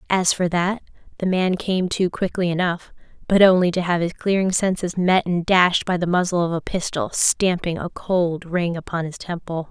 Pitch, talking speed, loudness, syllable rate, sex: 175 Hz, 200 wpm, -20 LUFS, 4.8 syllables/s, female